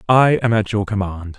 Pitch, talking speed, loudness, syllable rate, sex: 105 Hz, 215 wpm, -18 LUFS, 5.0 syllables/s, male